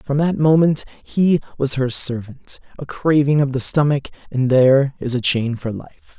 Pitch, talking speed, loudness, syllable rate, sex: 140 Hz, 185 wpm, -18 LUFS, 4.7 syllables/s, male